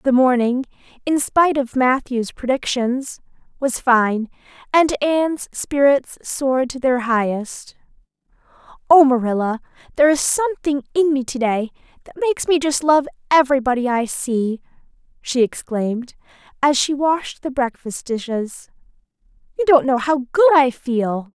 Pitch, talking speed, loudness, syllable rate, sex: 265 Hz, 130 wpm, -18 LUFS, 4.7 syllables/s, female